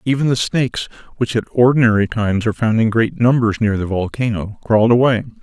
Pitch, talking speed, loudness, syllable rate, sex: 115 Hz, 190 wpm, -16 LUFS, 6.1 syllables/s, male